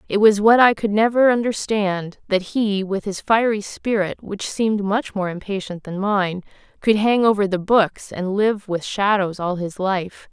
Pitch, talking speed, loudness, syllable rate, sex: 205 Hz, 185 wpm, -20 LUFS, 4.4 syllables/s, female